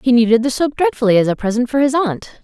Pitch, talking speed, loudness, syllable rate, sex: 250 Hz, 270 wpm, -15 LUFS, 6.4 syllables/s, female